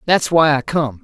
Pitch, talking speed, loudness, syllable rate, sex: 145 Hz, 235 wpm, -15 LUFS, 4.5 syllables/s, male